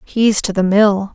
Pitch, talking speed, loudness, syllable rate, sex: 205 Hz, 210 wpm, -14 LUFS, 3.9 syllables/s, female